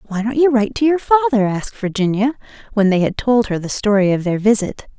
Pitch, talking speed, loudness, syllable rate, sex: 225 Hz, 230 wpm, -17 LUFS, 6.1 syllables/s, female